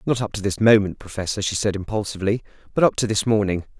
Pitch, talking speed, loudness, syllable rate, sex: 105 Hz, 220 wpm, -21 LUFS, 6.8 syllables/s, male